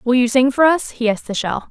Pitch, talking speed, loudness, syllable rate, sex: 245 Hz, 315 wpm, -17 LUFS, 6.0 syllables/s, female